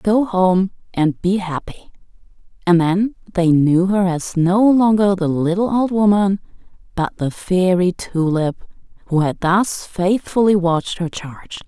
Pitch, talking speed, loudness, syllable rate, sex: 185 Hz, 145 wpm, -17 LUFS, 4.0 syllables/s, female